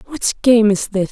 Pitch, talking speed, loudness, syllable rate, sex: 220 Hz, 215 wpm, -15 LUFS, 4.5 syllables/s, female